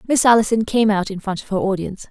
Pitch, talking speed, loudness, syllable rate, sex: 210 Hz, 255 wpm, -18 LUFS, 6.8 syllables/s, female